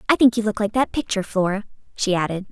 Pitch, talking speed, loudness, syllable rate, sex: 210 Hz, 240 wpm, -21 LUFS, 7.1 syllables/s, female